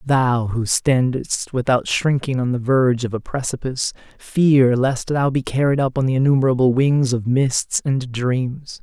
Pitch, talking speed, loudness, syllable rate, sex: 130 Hz, 170 wpm, -19 LUFS, 4.4 syllables/s, male